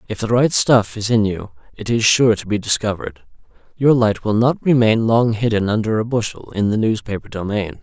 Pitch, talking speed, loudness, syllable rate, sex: 110 Hz, 205 wpm, -17 LUFS, 5.3 syllables/s, male